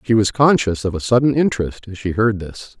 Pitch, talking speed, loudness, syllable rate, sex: 110 Hz, 235 wpm, -18 LUFS, 5.6 syllables/s, male